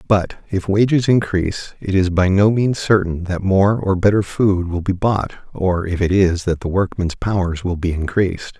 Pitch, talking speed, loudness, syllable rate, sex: 95 Hz, 200 wpm, -18 LUFS, 4.7 syllables/s, male